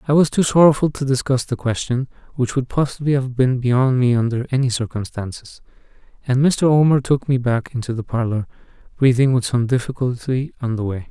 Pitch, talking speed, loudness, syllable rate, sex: 130 Hz, 185 wpm, -19 LUFS, 5.5 syllables/s, male